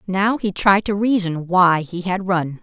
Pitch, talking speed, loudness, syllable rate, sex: 185 Hz, 205 wpm, -18 LUFS, 4.0 syllables/s, female